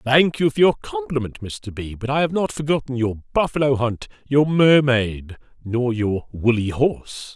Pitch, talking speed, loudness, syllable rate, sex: 125 Hz, 170 wpm, -20 LUFS, 4.5 syllables/s, male